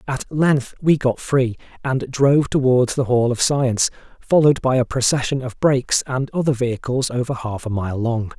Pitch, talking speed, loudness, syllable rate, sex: 130 Hz, 185 wpm, -19 LUFS, 5.1 syllables/s, male